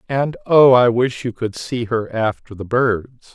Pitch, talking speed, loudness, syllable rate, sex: 120 Hz, 195 wpm, -17 LUFS, 3.9 syllables/s, male